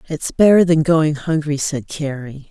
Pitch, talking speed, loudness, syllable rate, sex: 150 Hz, 165 wpm, -17 LUFS, 4.3 syllables/s, female